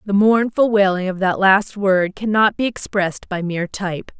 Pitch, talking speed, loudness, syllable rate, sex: 195 Hz, 185 wpm, -18 LUFS, 4.9 syllables/s, female